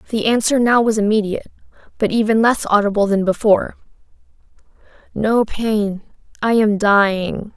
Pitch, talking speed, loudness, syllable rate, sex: 215 Hz, 120 wpm, -17 LUFS, 5.1 syllables/s, female